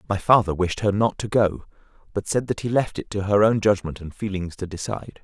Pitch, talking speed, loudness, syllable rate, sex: 100 Hz, 240 wpm, -23 LUFS, 5.7 syllables/s, male